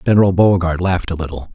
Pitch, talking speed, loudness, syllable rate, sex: 90 Hz, 195 wpm, -16 LUFS, 7.7 syllables/s, male